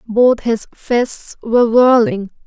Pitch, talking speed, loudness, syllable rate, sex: 230 Hz, 120 wpm, -14 LUFS, 3.4 syllables/s, female